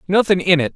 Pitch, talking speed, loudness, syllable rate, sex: 180 Hz, 235 wpm, -16 LUFS, 6.8 syllables/s, male